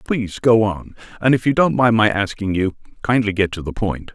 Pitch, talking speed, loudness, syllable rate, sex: 105 Hz, 230 wpm, -18 LUFS, 5.4 syllables/s, male